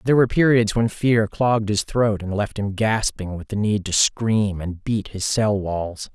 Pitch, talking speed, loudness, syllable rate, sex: 105 Hz, 215 wpm, -21 LUFS, 4.5 syllables/s, male